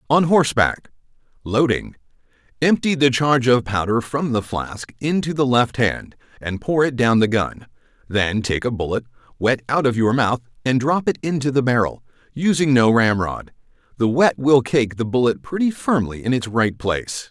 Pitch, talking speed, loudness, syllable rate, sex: 125 Hz, 170 wpm, -19 LUFS, 4.9 syllables/s, male